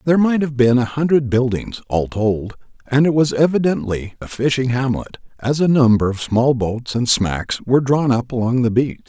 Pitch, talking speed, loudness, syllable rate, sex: 125 Hz, 200 wpm, -18 LUFS, 5.0 syllables/s, male